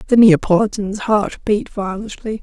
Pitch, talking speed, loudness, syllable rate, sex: 205 Hz, 125 wpm, -17 LUFS, 4.5 syllables/s, female